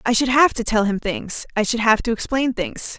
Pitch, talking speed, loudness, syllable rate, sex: 235 Hz, 260 wpm, -19 LUFS, 5.1 syllables/s, female